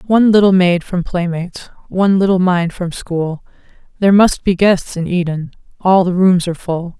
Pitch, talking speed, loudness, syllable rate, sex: 180 Hz, 180 wpm, -14 LUFS, 5.2 syllables/s, female